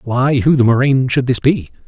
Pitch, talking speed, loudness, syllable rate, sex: 130 Hz, 225 wpm, -14 LUFS, 4.7 syllables/s, male